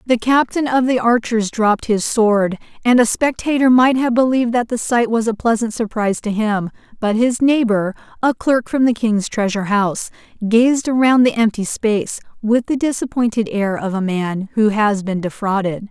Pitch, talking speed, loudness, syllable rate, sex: 225 Hz, 185 wpm, -17 LUFS, 5.0 syllables/s, female